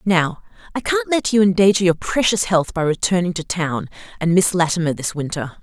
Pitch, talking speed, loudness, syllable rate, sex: 180 Hz, 190 wpm, -18 LUFS, 5.3 syllables/s, female